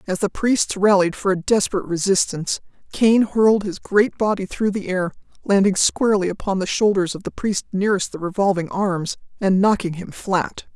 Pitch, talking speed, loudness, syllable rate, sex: 195 Hz, 180 wpm, -20 LUFS, 5.3 syllables/s, female